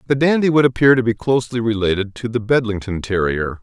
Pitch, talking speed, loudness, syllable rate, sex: 115 Hz, 200 wpm, -17 LUFS, 6.1 syllables/s, male